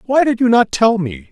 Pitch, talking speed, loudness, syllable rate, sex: 210 Hz, 275 wpm, -14 LUFS, 5.2 syllables/s, male